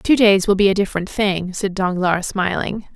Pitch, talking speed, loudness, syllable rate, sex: 195 Hz, 205 wpm, -18 LUFS, 4.9 syllables/s, female